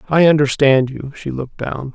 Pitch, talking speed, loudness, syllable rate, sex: 140 Hz, 185 wpm, -17 LUFS, 4.6 syllables/s, male